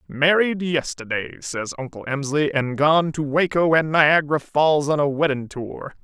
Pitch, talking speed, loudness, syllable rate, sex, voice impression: 150 Hz, 160 wpm, -20 LUFS, 4.5 syllables/s, male, very masculine, middle-aged, thick, slightly muffled, fluent, unique, slightly intense